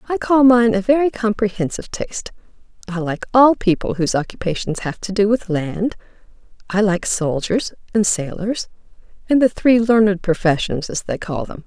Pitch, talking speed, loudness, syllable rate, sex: 205 Hz, 165 wpm, -18 LUFS, 5.2 syllables/s, female